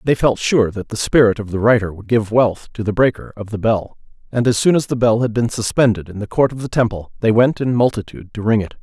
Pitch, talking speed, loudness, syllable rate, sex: 115 Hz, 270 wpm, -17 LUFS, 6.0 syllables/s, male